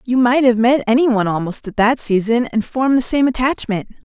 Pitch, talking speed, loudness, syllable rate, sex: 240 Hz, 205 wpm, -16 LUFS, 5.6 syllables/s, female